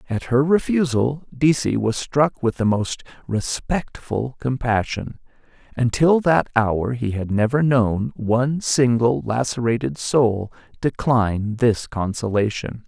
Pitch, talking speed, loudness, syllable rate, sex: 120 Hz, 115 wpm, -21 LUFS, 3.9 syllables/s, male